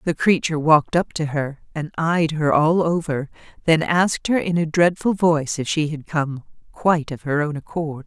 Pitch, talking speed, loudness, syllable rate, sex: 160 Hz, 195 wpm, -20 LUFS, 5.0 syllables/s, female